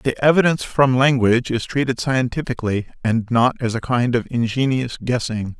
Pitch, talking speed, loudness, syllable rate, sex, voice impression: 125 Hz, 160 wpm, -19 LUFS, 5.5 syllables/s, male, masculine, adult-like, slightly powerful, slightly hard, cool, intellectual, sincere, slightly friendly, slightly reassuring, slightly wild